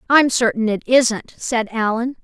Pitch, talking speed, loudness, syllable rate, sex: 235 Hz, 160 wpm, -18 LUFS, 4.1 syllables/s, female